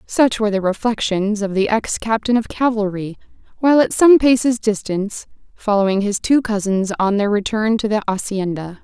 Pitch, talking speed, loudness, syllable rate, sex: 215 Hz, 170 wpm, -17 LUFS, 5.2 syllables/s, female